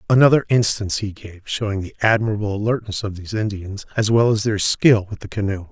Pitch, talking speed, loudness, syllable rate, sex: 105 Hz, 200 wpm, -20 LUFS, 6.1 syllables/s, male